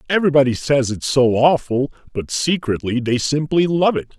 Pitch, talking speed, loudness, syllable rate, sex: 140 Hz, 160 wpm, -18 LUFS, 5.0 syllables/s, male